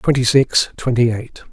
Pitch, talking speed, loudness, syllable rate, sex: 125 Hz, 160 wpm, -16 LUFS, 5.1 syllables/s, male